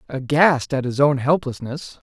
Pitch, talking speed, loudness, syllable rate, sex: 140 Hz, 145 wpm, -19 LUFS, 4.3 syllables/s, male